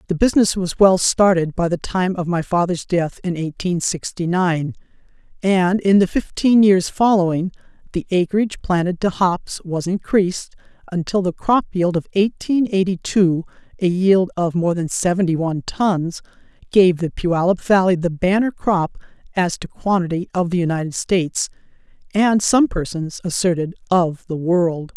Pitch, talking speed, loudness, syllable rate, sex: 180 Hz, 155 wpm, -19 LUFS, 4.6 syllables/s, female